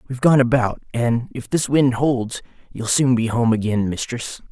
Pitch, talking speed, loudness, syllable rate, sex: 120 Hz, 185 wpm, -19 LUFS, 4.8 syllables/s, male